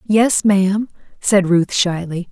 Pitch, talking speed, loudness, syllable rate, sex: 195 Hz, 130 wpm, -16 LUFS, 3.7 syllables/s, female